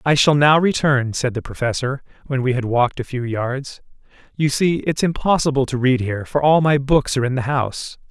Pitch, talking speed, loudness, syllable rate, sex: 135 Hz, 215 wpm, -19 LUFS, 5.5 syllables/s, male